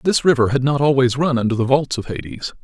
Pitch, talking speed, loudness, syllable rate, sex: 130 Hz, 250 wpm, -18 LUFS, 6.1 syllables/s, male